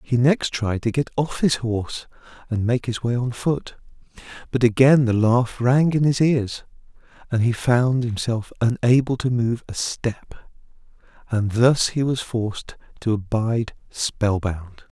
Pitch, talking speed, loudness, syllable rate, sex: 120 Hz, 155 wpm, -21 LUFS, 4.1 syllables/s, male